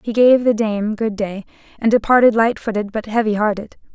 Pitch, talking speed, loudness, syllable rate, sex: 220 Hz, 200 wpm, -17 LUFS, 5.1 syllables/s, female